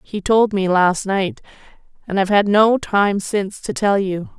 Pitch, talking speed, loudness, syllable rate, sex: 200 Hz, 190 wpm, -17 LUFS, 4.5 syllables/s, female